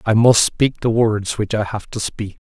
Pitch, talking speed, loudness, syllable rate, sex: 110 Hz, 245 wpm, -18 LUFS, 4.4 syllables/s, male